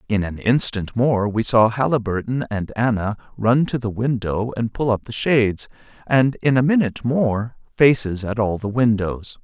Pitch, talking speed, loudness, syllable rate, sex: 115 Hz, 180 wpm, -20 LUFS, 4.6 syllables/s, male